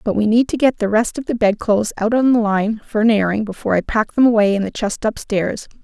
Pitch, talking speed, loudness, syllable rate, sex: 220 Hz, 290 wpm, -17 LUFS, 6.0 syllables/s, female